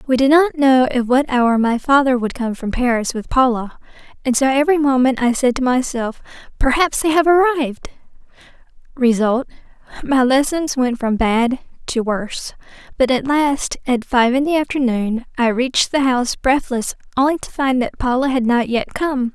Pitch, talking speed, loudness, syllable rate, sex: 260 Hz, 175 wpm, -17 LUFS, 5.0 syllables/s, female